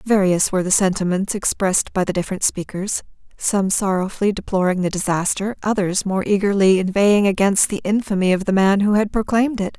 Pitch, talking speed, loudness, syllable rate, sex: 195 Hz, 165 wpm, -19 LUFS, 5.9 syllables/s, female